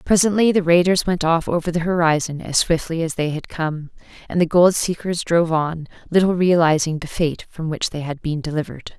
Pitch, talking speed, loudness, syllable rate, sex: 165 Hz, 200 wpm, -19 LUFS, 5.5 syllables/s, female